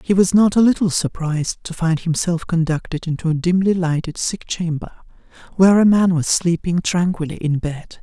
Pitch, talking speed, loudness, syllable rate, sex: 170 Hz, 180 wpm, -18 LUFS, 5.3 syllables/s, male